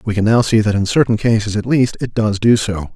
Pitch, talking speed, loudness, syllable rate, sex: 110 Hz, 285 wpm, -15 LUFS, 5.9 syllables/s, male